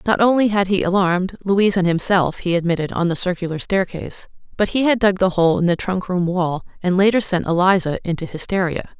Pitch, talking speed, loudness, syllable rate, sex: 185 Hz, 195 wpm, -18 LUFS, 5.8 syllables/s, female